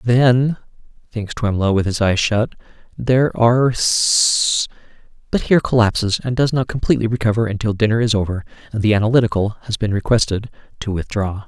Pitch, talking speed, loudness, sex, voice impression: 110 Hz, 155 wpm, -17 LUFS, male, very masculine, adult-like, slightly thick, slightly tensed, slightly weak, slightly dark, slightly hard, slightly muffled, fluent, slightly raspy, cool, intellectual, refreshing, slightly sincere, calm, slightly friendly, reassuring, slightly unique, elegant, slightly wild, slightly sweet, lively, strict, slightly modest